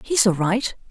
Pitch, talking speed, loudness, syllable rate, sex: 210 Hz, 200 wpm, -20 LUFS, 4.3 syllables/s, female